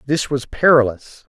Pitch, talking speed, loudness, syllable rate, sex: 130 Hz, 135 wpm, -16 LUFS, 4.4 syllables/s, male